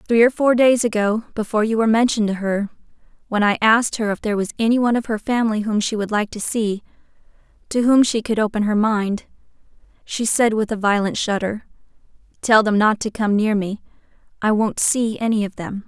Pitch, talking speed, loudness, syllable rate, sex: 215 Hz, 195 wpm, -19 LUFS, 5.9 syllables/s, female